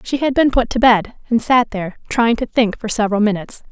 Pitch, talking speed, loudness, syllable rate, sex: 225 Hz, 240 wpm, -17 LUFS, 5.9 syllables/s, female